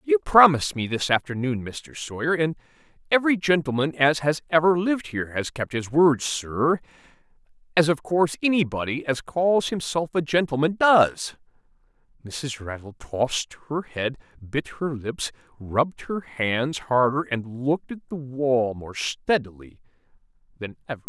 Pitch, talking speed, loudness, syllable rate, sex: 145 Hz, 145 wpm, -23 LUFS, 4.6 syllables/s, male